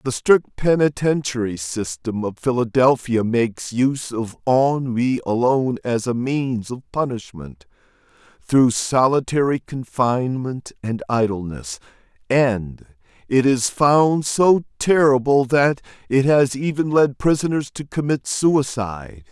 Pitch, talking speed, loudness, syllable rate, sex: 130 Hz, 110 wpm, -19 LUFS, 4.0 syllables/s, male